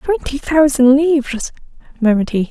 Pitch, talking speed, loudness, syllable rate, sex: 265 Hz, 120 wpm, -15 LUFS, 5.0 syllables/s, female